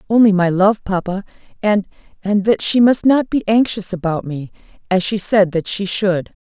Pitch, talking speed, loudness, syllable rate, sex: 200 Hz, 175 wpm, -16 LUFS, 4.8 syllables/s, female